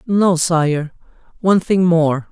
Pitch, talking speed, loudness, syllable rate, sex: 170 Hz, 130 wpm, -16 LUFS, 3.5 syllables/s, male